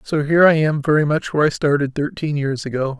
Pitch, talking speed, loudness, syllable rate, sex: 150 Hz, 240 wpm, -18 LUFS, 6.2 syllables/s, male